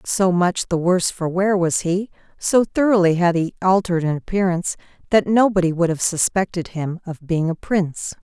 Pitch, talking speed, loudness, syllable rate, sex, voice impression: 180 Hz, 180 wpm, -19 LUFS, 5.2 syllables/s, female, very feminine, very middle-aged, very thin, tensed, powerful, bright, slightly soft, very clear, very fluent, cool, intellectual, very refreshing, sincere, calm, very friendly, reassuring, unique, slightly elegant, slightly wild, sweet, lively, kind, slightly intense, slightly modest